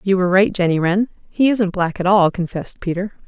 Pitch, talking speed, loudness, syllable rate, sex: 190 Hz, 220 wpm, -18 LUFS, 5.8 syllables/s, female